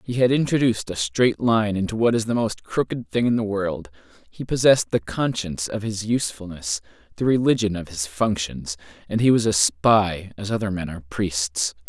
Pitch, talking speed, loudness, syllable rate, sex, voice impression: 100 Hz, 190 wpm, -22 LUFS, 5.3 syllables/s, male, masculine, middle-aged, tensed, powerful, hard, clear, cool, calm, mature, wild, lively, strict